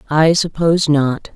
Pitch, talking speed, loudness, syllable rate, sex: 155 Hz, 135 wpm, -15 LUFS, 4.4 syllables/s, female